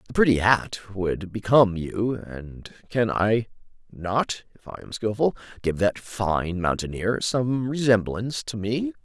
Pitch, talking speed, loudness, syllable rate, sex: 110 Hz, 145 wpm, -24 LUFS, 4.1 syllables/s, male